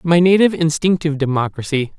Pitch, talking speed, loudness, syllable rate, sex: 160 Hz, 120 wpm, -16 LUFS, 6.6 syllables/s, male